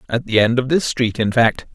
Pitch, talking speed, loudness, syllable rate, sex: 120 Hz, 275 wpm, -17 LUFS, 5.3 syllables/s, male